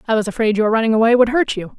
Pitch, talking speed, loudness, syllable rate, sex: 225 Hz, 305 wpm, -16 LUFS, 7.4 syllables/s, female